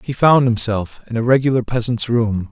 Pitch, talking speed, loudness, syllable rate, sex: 120 Hz, 190 wpm, -17 LUFS, 5.1 syllables/s, male